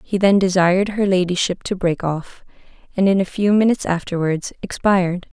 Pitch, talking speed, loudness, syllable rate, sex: 185 Hz, 165 wpm, -18 LUFS, 5.4 syllables/s, female